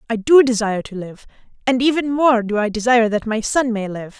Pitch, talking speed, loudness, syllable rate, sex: 230 Hz, 230 wpm, -17 LUFS, 5.9 syllables/s, female